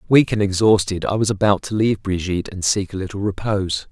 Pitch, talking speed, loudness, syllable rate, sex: 100 Hz, 215 wpm, -19 LUFS, 6.2 syllables/s, male